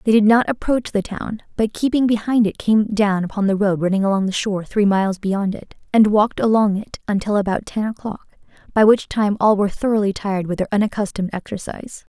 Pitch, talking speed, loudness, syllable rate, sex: 205 Hz, 205 wpm, -19 LUFS, 6.0 syllables/s, female